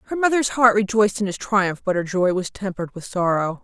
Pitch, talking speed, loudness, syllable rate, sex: 200 Hz, 230 wpm, -20 LUFS, 5.9 syllables/s, female